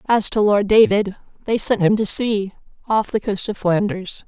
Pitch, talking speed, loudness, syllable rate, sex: 205 Hz, 195 wpm, -18 LUFS, 4.5 syllables/s, female